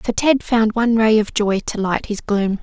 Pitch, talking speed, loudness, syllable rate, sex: 220 Hz, 250 wpm, -18 LUFS, 4.8 syllables/s, female